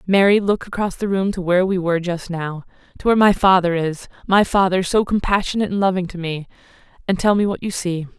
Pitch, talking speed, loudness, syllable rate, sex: 185 Hz, 200 wpm, -19 LUFS, 6.1 syllables/s, female